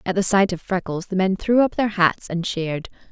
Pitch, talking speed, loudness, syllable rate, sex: 190 Hz, 250 wpm, -21 LUFS, 5.4 syllables/s, female